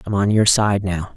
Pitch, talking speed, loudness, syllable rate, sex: 100 Hz, 260 wpm, -17 LUFS, 4.9 syllables/s, male